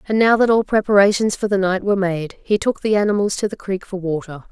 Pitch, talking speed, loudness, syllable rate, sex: 200 Hz, 250 wpm, -18 LUFS, 6.1 syllables/s, female